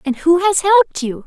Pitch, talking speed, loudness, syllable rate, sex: 330 Hz, 235 wpm, -14 LUFS, 5.1 syllables/s, female